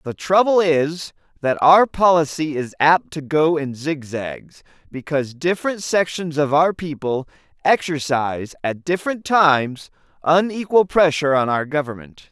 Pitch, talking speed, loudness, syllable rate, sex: 155 Hz, 130 wpm, -19 LUFS, 4.5 syllables/s, male